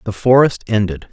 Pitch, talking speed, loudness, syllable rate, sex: 110 Hz, 160 wpm, -14 LUFS, 5.2 syllables/s, male